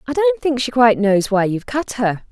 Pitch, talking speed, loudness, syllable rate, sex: 245 Hz, 260 wpm, -17 LUFS, 5.6 syllables/s, female